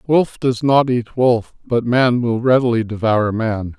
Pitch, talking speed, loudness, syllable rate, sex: 120 Hz, 175 wpm, -17 LUFS, 3.9 syllables/s, male